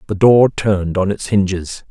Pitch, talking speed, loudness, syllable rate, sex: 100 Hz, 190 wpm, -15 LUFS, 4.7 syllables/s, male